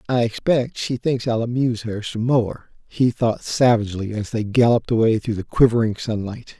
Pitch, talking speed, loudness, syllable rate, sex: 115 Hz, 180 wpm, -20 LUFS, 5.1 syllables/s, male